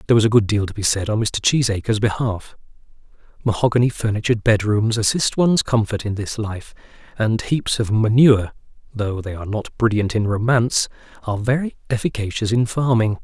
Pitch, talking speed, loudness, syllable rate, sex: 110 Hz, 170 wpm, -19 LUFS, 5.8 syllables/s, male